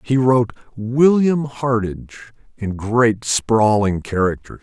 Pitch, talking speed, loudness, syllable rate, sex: 115 Hz, 105 wpm, -18 LUFS, 3.9 syllables/s, male